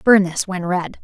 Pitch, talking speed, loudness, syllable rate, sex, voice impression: 185 Hz, 230 wpm, -19 LUFS, 4.3 syllables/s, female, very feminine, slightly middle-aged, very thin, tensed, powerful, slightly bright, slightly soft, clear, fluent, raspy, cool, slightly intellectual, refreshing, slightly sincere, slightly calm, slightly friendly, slightly reassuring, very unique, slightly elegant, wild, very lively, very strict, intense, very sharp, light